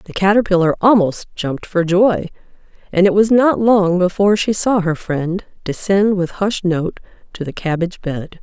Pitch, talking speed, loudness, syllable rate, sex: 185 Hz, 170 wpm, -16 LUFS, 4.9 syllables/s, female